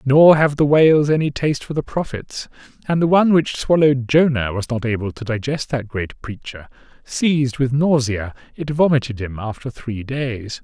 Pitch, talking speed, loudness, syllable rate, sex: 135 Hz, 180 wpm, -18 LUFS, 5.0 syllables/s, male